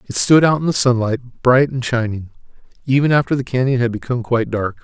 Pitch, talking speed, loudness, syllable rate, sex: 125 Hz, 210 wpm, -17 LUFS, 6.2 syllables/s, male